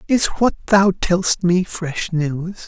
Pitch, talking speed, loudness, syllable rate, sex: 180 Hz, 155 wpm, -18 LUFS, 3.4 syllables/s, male